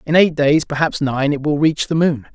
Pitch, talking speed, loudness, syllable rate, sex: 150 Hz, 230 wpm, -17 LUFS, 5.1 syllables/s, male